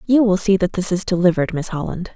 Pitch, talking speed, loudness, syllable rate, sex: 185 Hz, 250 wpm, -18 LUFS, 6.5 syllables/s, female